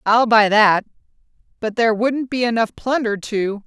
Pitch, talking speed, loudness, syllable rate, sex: 225 Hz, 165 wpm, -18 LUFS, 4.7 syllables/s, female